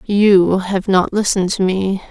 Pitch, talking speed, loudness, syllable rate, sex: 195 Hz, 170 wpm, -15 LUFS, 4.1 syllables/s, female